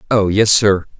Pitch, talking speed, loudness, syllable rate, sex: 100 Hz, 180 wpm, -13 LUFS, 4.4 syllables/s, male